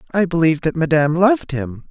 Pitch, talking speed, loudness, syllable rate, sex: 165 Hz, 190 wpm, -17 LUFS, 6.8 syllables/s, male